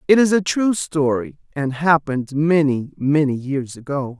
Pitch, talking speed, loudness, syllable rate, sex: 155 Hz, 155 wpm, -19 LUFS, 4.5 syllables/s, female